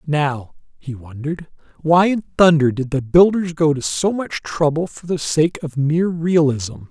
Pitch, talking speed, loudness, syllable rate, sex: 155 Hz, 175 wpm, -18 LUFS, 4.4 syllables/s, male